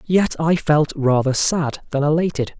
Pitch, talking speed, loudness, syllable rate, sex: 155 Hz, 160 wpm, -19 LUFS, 4.4 syllables/s, male